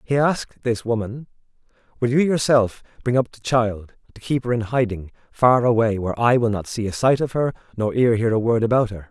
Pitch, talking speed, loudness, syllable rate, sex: 115 Hz, 225 wpm, -20 LUFS, 5.5 syllables/s, male